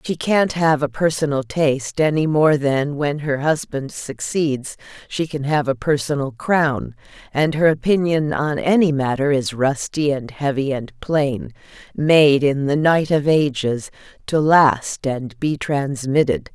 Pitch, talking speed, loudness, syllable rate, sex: 145 Hz, 150 wpm, -19 LUFS, 4.0 syllables/s, female